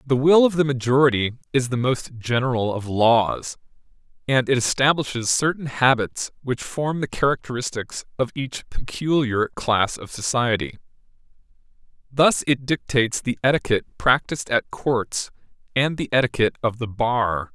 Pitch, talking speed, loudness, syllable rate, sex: 125 Hz, 135 wpm, -21 LUFS, 4.7 syllables/s, male